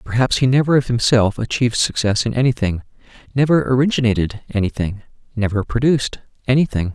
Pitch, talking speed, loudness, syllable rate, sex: 120 Hz, 130 wpm, -18 LUFS, 6.1 syllables/s, male